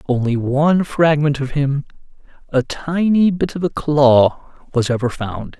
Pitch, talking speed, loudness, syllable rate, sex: 140 Hz, 150 wpm, -17 LUFS, 4.1 syllables/s, male